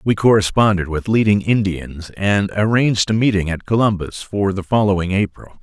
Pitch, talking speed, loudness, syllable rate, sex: 100 Hz, 160 wpm, -17 LUFS, 5.1 syllables/s, male